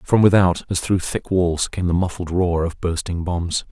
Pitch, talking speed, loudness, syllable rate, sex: 90 Hz, 210 wpm, -20 LUFS, 4.5 syllables/s, male